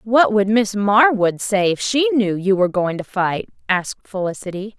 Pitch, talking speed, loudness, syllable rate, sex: 205 Hz, 190 wpm, -18 LUFS, 4.7 syllables/s, female